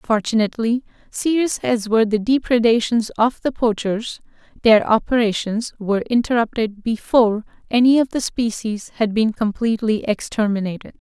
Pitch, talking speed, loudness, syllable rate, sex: 225 Hz, 120 wpm, -19 LUFS, 5.1 syllables/s, female